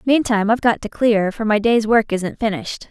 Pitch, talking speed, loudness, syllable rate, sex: 220 Hz, 225 wpm, -18 LUFS, 5.7 syllables/s, female